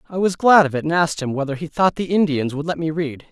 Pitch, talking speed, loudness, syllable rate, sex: 160 Hz, 310 wpm, -19 LUFS, 6.4 syllables/s, male